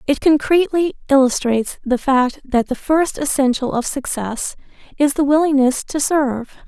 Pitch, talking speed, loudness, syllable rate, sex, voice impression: 275 Hz, 145 wpm, -17 LUFS, 4.9 syllables/s, female, feminine, tensed, bright, soft, clear, slightly raspy, intellectual, calm, friendly, reassuring, elegant, lively, kind, modest